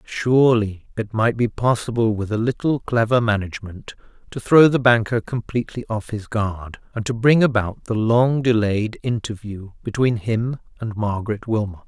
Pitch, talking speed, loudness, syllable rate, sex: 115 Hz, 155 wpm, -20 LUFS, 4.8 syllables/s, male